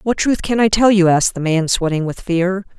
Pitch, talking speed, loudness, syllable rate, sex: 185 Hz, 260 wpm, -16 LUFS, 5.5 syllables/s, female